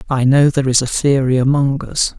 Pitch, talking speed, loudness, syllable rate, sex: 135 Hz, 220 wpm, -15 LUFS, 5.6 syllables/s, male